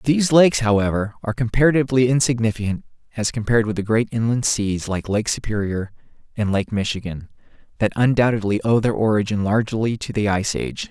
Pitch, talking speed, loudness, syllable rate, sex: 110 Hz, 160 wpm, -20 LUFS, 6.3 syllables/s, male